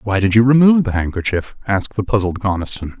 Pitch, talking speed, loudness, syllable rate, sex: 105 Hz, 200 wpm, -16 LUFS, 6.5 syllables/s, male